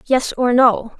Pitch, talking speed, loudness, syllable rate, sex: 245 Hz, 180 wpm, -15 LUFS, 3.5 syllables/s, female